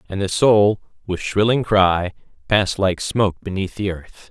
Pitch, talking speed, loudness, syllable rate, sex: 100 Hz, 165 wpm, -19 LUFS, 4.5 syllables/s, male